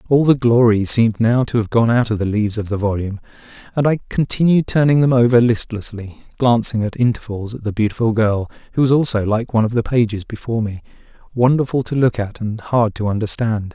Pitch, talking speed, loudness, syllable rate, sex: 115 Hz, 205 wpm, -17 LUFS, 6.0 syllables/s, male